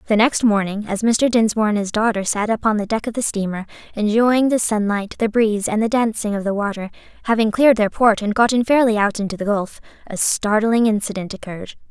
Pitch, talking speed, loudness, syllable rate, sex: 215 Hz, 210 wpm, -18 LUFS, 5.9 syllables/s, female